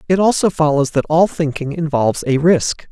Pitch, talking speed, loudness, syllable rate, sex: 155 Hz, 185 wpm, -16 LUFS, 5.3 syllables/s, male